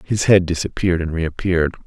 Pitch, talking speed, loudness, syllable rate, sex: 85 Hz, 160 wpm, -18 LUFS, 6.0 syllables/s, male